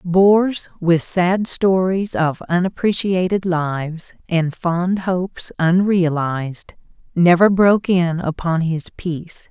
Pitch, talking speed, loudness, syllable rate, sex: 175 Hz, 105 wpm, -18 LUFS, 3.7 syllables/s, female